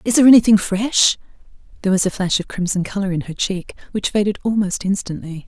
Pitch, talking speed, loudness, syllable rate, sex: 195 Hz, 195 wpm, -18 LUFS, 6.2 syllables/s, female